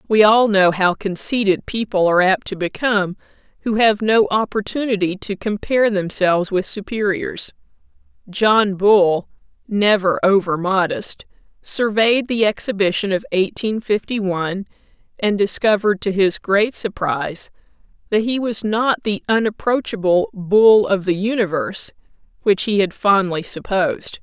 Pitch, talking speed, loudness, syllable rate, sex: 200 Hz, 130 wpm, -18 LUFS, 4.6 syllables/s, female